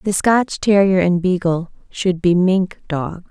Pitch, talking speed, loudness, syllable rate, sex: 185 Hz, 165 wpm, -17 LUFS, 3.7 syllables/s, female